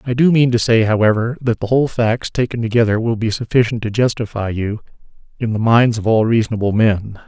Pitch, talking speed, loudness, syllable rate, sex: 115 Hz, 205 wpm, -16 LUFS, 5.9 syllables/s, male